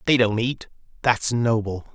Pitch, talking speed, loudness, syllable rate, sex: 115 Hz, 155 wpm, -22 LUFS, 4.3 syllables/s, male